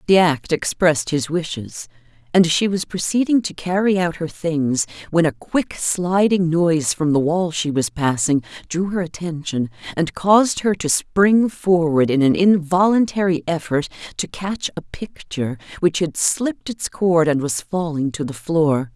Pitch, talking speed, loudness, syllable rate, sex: 165 Hz, 170 wpm, -19 LUFS, 4.4 syllables/s, female